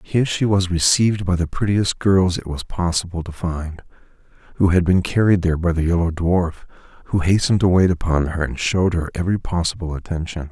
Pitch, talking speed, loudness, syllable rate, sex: 90 Hz, 195 wpm, -19 LUFS, 5.9 syllables/s, male